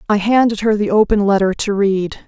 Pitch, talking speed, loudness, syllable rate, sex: 205 Hz, 210 wpm, -15 LUFS, 5.4 syllables/s, female